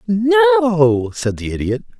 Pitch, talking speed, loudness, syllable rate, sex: 195 Hz, 120 wpm, -16 LUFS, 5.2 syllables/s, male